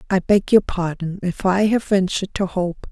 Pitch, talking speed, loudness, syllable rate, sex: 190 Hz, 205 wpm, -19 LUFS, 4.9 syllables/s, female